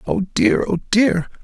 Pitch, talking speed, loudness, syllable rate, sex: 155 Hz, 170 wpm, -18 LUFS, 3.9 syllables/s, male